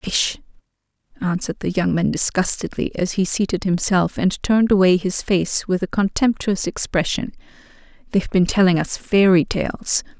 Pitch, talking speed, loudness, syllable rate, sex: 190 Hz, 145 wpm, -19 LUFS, 4.9 syllables/s, female